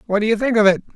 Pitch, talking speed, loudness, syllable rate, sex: 215 Hz, 375 wpm, -16 LUFS, 8.5 syllables/s, male